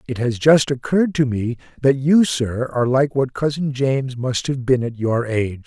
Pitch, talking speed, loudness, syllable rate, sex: 130 Hz, 210 wpm, -19 LUFS, 5.0 syllables/s, male